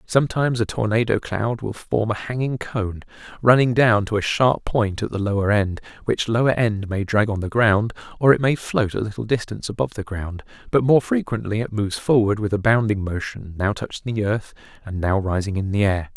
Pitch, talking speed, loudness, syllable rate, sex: 110 Hz, 210 wpm, -21 LUFS, 5.5 syllables/s, male